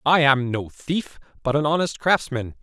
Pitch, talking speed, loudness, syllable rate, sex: 145 Hz, 185 wpm, -22 LUFS, 4.5 syllables/s, male